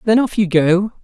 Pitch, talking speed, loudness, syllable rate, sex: 200 Hz, 230 wpm, -15 LUFS, 4.9 syllables/s, male